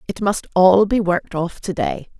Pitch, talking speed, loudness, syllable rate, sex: 190 Hz, 220 wpm, -18 LUFS, 4.8 syllables/s, female